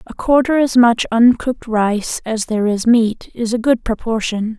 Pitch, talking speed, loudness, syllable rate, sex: 230 Hz, 185 wpm, -16 LUFS, 4.6 syllables/s, female